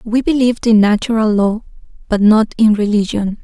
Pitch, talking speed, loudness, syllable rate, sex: 220 Hz, 155 wpm, -14 LUFS, 5.2 syllables/s, female